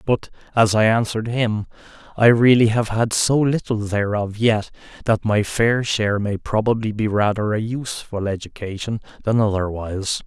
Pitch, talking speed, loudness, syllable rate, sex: 110 Hz, 150 wpm, -20 LUFS, 4.9 syllables/s, male